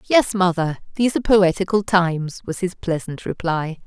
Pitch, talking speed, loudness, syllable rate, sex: 180 Hz, 155 wpm, -20 LUFS, 5.2 syllables/s, female